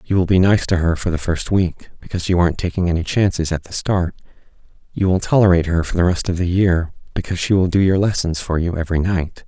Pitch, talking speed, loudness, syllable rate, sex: 90 Hz, 245 wpm, -18 LUFS, 6.4 syllables/s, male